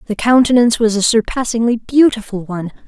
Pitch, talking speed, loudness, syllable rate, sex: 225 Hz, 145 wpm, -14 LUFS, 6.2 syllables/s, female